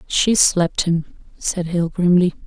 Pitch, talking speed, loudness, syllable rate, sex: 175 Hz, 145 wpm, -18 LUFS, 4.0 syllables/s, female